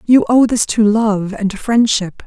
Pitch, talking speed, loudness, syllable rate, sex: 215 Hz, 185 wpm, -14 LUFS, 3.8 syllables/s, female